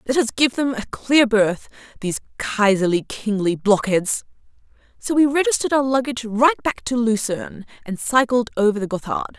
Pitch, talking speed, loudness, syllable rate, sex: 235 Hz, 160 wpm, -20 LUFS, 5.5 syllables/s, female